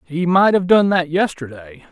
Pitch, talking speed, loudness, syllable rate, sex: 170 Hz, 190 wpm, -16 LUFS, 4.5 syllables/s, male